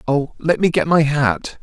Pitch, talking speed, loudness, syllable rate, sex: 145 Hz, 185 wpm, -17 LUFS, 4.1 syllables/s, male